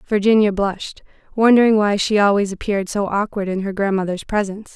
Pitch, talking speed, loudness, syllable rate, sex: 205 Hz, 165 wpm, -18 LUFS, 6.1 syllables/s, female